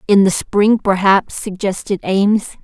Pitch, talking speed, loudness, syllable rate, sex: 195 Hz, 135 wpm, -15 LUFS, 4.4 syllables/s, female